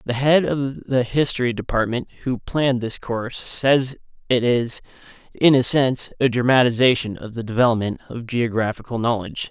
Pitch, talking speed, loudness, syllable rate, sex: 125 Hz, 150 wpm, -20 LUFS, 5.2 syllables/s, male